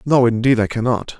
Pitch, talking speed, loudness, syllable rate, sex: 120 Hz, 200 wpm, -17 LUFS, 5.6 syllables/s, male